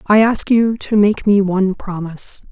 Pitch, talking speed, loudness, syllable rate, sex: 200 Hz, 190 wpm, -15 LUFS, 4.6 syllables/s, female